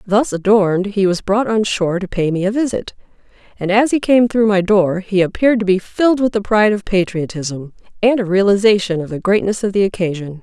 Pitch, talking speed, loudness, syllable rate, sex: 200 Hz, 220 wpm, -16 LUFS, 5.7 syllables/s, female